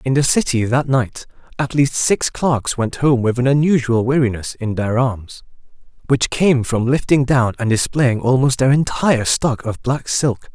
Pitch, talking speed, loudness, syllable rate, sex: 125 Hz, 180 wpm, -17 LUFS, 4.5 syllables/s, male